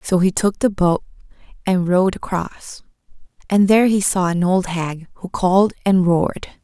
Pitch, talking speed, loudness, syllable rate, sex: 185 Hz, 170 wpm, -18 LUFS, 4.9 syllables/s, female